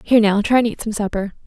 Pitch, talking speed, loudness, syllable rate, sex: 215 Hz, 285 wpm, -18 LUFS, 7.1 syllables/s, female